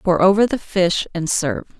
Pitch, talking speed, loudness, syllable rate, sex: 185 Hz, 200 wpm, -18 LUFS, 4.9 syllables/s, female